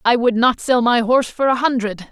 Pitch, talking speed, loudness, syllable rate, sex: 240 Hz, 255 wpm, -17 LUFS, 5.5 syllables/s, female